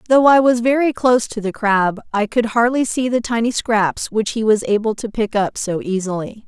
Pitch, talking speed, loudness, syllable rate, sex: 225 Hz, 220 wpm, -17 LUFS, 5.1 syllables/s, female